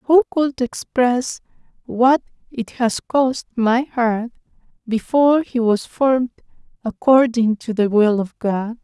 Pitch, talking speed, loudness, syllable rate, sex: 240 Hz, 130 wpm, -18 LUFS, 3.7 syllables/s, female